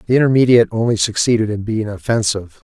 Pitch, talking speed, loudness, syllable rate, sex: 110 Hz, 155 wpm, -16 LUFS, 7.0 syllables/s, male